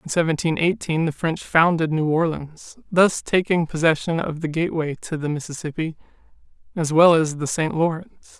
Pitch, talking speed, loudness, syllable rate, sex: 160 Hz, 165 wpm, -21 LUFS, 5.2 syllables/s, male